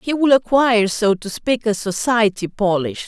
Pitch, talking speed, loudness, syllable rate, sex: 220 Hz, 175 wpm, -17 LUFS, 4.7 syllables/s, female